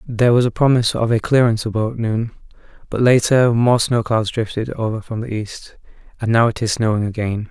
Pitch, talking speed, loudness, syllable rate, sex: 115 Hz, 200 wpm, -18 LUFS, 5.6 syllables/s, male